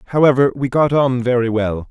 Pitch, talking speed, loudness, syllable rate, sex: 125 Hz, 190 wpm, -16 LUFS, 5.7 syllables/s, male